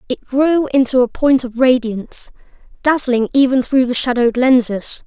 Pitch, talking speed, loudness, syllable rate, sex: 255 Hz, 155 wpm, -15 LUFS, 4.8 syllables/s, female